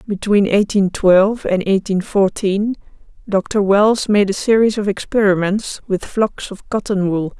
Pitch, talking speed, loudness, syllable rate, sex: 200 Hz, 145 wpm, -16 LUFS, 4.2 syllables/s, female